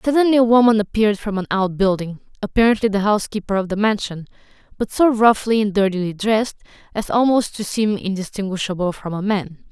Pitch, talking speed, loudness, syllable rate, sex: 205 Hz, 160 wpm, -19 LUFS, 6.0 syllables/s, female